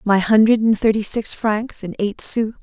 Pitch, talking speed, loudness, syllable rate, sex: 215 Hz, 205 wpm, -18 LUFS, 4.6 syllables/s, female